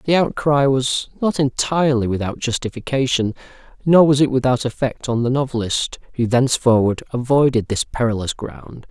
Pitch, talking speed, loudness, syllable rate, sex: 125 Hz, 140 wpm, -18 LUFS, 5.1 syllables/s, male